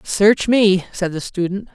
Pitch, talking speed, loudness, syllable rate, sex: 195 Hz, 170 wpm, -17 LUFS, 3.9 syllables/s, female